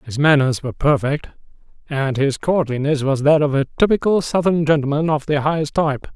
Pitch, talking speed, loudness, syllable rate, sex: 145 Hz, 175 wpm, -18 LUFS, 5.7 syllables/s, male